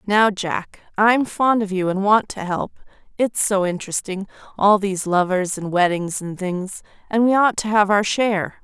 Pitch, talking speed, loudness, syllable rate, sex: 200 Hz, 180 wpm, -19 LUFS, 4.7 syllables/s, female